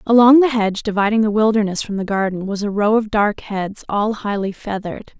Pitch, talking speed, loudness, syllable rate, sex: 210 Hz, 210 wpm, -18 LUFS, 5.8 syllables/s, female